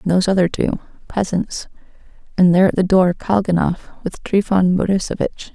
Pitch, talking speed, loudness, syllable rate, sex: 185 Hz, 150 wpm, -17 LUFS, 5.5 syllables/s, female